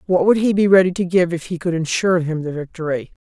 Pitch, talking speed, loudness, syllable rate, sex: 175 Hz, 260 wpm, -18 LUFS, 6.3 syllables/s, female